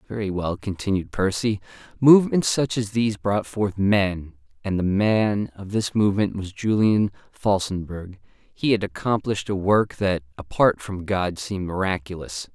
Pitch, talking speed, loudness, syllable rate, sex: 100 Hz, 140 wpm, -23 LUFS, 4.6 syllables/s, male